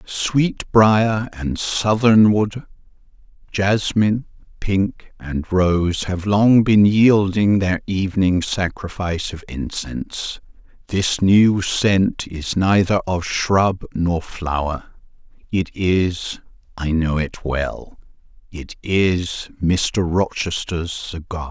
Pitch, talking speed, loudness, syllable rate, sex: 95 Hz, 100 wpm, -19 LUFS, 3.0 syllables/s, male